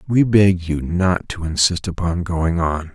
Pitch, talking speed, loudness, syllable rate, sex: 90 Hz, 185 wpm, -18 LUFS, 4.0 syllables/s, male